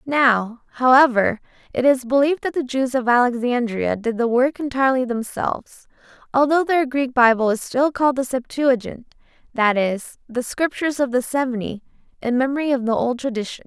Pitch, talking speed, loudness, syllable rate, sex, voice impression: 255 Hz, 155 wpm, -20 LUFS, 5.3 syllables/s, female, very feminine, gender-neutral, very young, very thin, slightly tensed, slightly weak, very bright, very hard, very clear, fluent, very cute, intellectual, very refreshing, very sincere, slightly calm, very friendly, very reassuring, very unique, very elegant, very sweet, very lively, very kind, sharp, slightly modest, very light